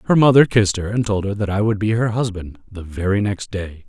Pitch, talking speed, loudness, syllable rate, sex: 100 Hz, 265 wpm, -18 LUFS, 6.0 syllables/s, male